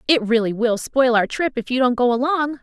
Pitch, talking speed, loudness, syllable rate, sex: 250 Hz, 250 wpm, -19 LUFS, 5.3 syllables/s, female